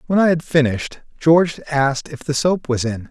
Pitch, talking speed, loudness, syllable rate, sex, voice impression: 145 Hz, 210 wpm, -18 LUFS, 5.4 syllables/s, male, masculine, adult-like, slightly soft, slightly refreshing, friendly, slightly sweet